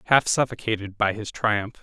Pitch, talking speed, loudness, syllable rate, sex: 110 Hz, 165 wpm, -24 LUFS, 5.1 syllables/s, male